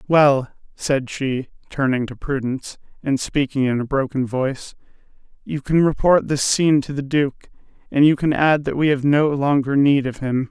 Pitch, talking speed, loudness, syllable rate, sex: 140 Hz, 185 wpm, -19 LUFS, 4.8 syllables/s, male